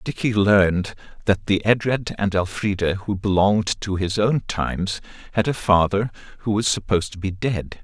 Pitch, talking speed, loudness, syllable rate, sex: 100 Hz, 170 wpm, -21 LUFS, 5.0 syllables/s, male